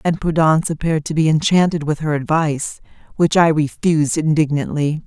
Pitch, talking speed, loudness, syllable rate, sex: 155 Hz, 155 wpm, -17 LUFS, 5.7 syllables/s, female